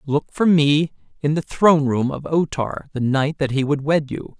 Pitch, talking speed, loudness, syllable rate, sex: 145 Hz, 230 wpm, -20 LUFS, 4.6 syllables/s, male